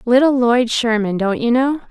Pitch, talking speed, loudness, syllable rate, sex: 240 Hz, 155 wpm, -16 LUFS, 4.7 syllables/s, female